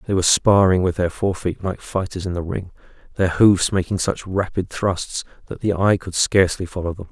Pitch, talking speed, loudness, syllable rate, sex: 95 Hz, 210 wpm, -20 LUFS, 5.3 syllables/s, male